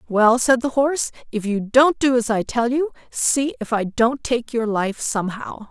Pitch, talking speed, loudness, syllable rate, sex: 240 Hz, 210 wpm, -20 LUFS, 4.5 syllables/s, female